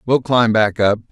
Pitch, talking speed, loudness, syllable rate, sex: 110 Hz, 215 wpm, -15 LUFS, 4.6 syllables/s, male